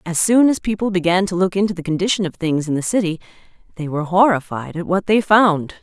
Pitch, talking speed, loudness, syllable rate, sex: 180 Hz, 225 wpm, -18 LUFS, 6.0 syllables/s, female